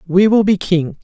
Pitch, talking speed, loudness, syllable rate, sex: 185 Hz, 235 wpm, -14 LUFS, 4.7 syllables/s, male